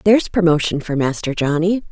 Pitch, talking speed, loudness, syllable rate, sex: 170 Hz, 155 wpm, -17 LUFS, 5.8 syllables/s, female